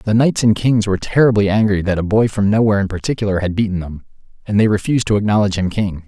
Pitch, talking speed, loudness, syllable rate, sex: 105 Hz, 235 wpm, -16 LUFS, 6.9 syllables/s, male